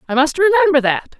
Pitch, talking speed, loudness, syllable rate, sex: 300 Hz, 200 wpm, -14 LUFS, 6.0 syllables/s, female